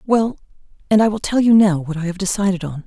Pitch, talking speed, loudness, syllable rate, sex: 195 Hz, 250 wpm, -17 LUFS, 6.2 syllables/s, female